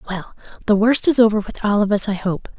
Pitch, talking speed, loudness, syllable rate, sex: 210 Hz, 255 wpm, -17 LUFS, 5.9 syllables/s, female